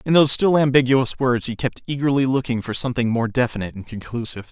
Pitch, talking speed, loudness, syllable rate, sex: 125 Hz, 200 wpm, -20 LUFS, 6.7 syllables/s, male